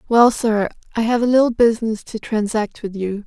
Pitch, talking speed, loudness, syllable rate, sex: 225 Hz, 200 wpm, -18 LUFS, 5.3 syllables/s, female